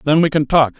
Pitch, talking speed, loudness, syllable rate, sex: 150 Hz, 300 wpm, -15 LUFS, 6.4 syllables/s, male